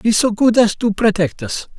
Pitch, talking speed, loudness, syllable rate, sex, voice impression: 210 Hz, 235 wpm, -16 LUFS, 4.8 syllables/s, male, masculine, very adult-like, sincere, slightly elegant, slightly kind